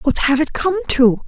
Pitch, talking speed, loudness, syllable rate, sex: 275 Hz, 235 wpm, -16 LUFS, 4.1 syllables/s, female